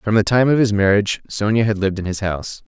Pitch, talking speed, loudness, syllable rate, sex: 105 Hz, 260 wpm, -18 LUFS, 6.6 syllables/s, male